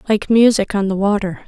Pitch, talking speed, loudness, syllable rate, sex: 205 Hz, 205 wpm, -16 LUFS, 5.4 syllables/s, female